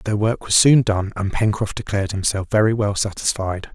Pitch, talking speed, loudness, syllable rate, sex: 105 Hz, 190 wpm, -19 LUFS, 5.4 syllables/s, male